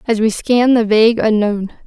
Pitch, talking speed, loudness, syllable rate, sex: 220 Hz, 195 wpm, -14 LUFS, 5.0 syllables/s, female